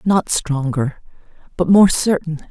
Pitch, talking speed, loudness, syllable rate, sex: 165 Hz, 120 wpm, -17 LUFS, 3.7 syllables/s, female